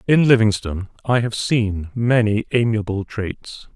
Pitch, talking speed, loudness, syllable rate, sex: 110 Hz, 130 wpm, -19 LUFS, 4.2 syllables/s, male